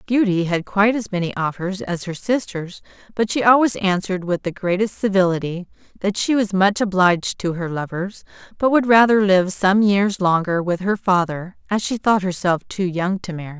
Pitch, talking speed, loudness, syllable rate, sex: 190 Hz, 190 wpm, -19 LUFS, 5.1 syllables/s, female